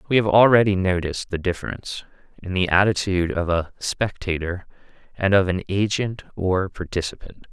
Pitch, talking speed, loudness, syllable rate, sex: 95 Hz, 145 wpm, -21 LUFS, 5.4 syllables/s, male